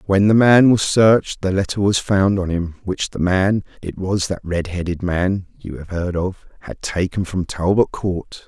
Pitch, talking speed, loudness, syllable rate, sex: 95 Hz, 185 wpm, -18 LUFS, 4.4 syllables/s, male